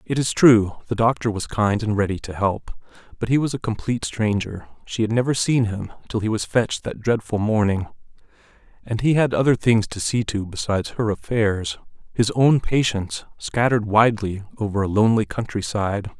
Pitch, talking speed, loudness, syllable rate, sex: 110 Hz, 180 wpm, -21 LUFS, 5.4 syllables/s, male